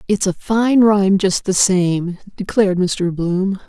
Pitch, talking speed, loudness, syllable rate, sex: 190 Hz, 165 wpm, -16 LUFS, 4.0 syllables/s, female